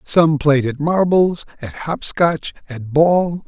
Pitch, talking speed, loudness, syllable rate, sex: 155 Hz, 140 wpm, -17 LUFS, 3.3 syllables/s, male